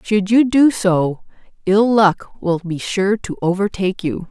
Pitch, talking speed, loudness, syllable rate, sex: 200 Hz, 165 wpm, -17 LUFS, 4.1 syllables/s, female